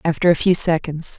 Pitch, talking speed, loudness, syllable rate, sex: 165 Hz, 200 wpm, -17 LUFS, 5.5 syllables/s, female